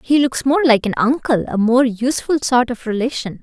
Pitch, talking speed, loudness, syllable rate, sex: 250 Hz, 195 wpm, -17 LUFS, 5.2 syllables/s, female